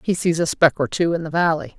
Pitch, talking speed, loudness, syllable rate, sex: 165 Hz, 300 wpm, -19 LUFS, 5.9 syllables/s, female